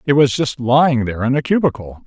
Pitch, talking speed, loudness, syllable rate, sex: 130 Hz, 235 wpm, -16 LUFS, 6.3 syllables/s, male